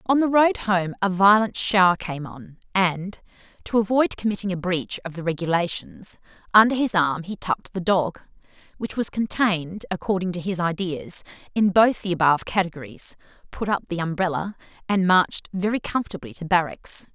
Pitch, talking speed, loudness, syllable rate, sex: 185 Hz, 165 wpm, -22 LUFS, 5.2 syllables/s, female